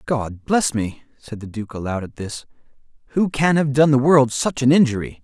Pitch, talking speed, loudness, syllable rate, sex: 130 Hz, 205 wpm, -19 LUFS, 4.9 syllables/s, male